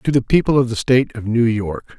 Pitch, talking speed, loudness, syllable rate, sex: 120 Hz, 270 wpm, -17 LUFS, 5.6 syllables/s, male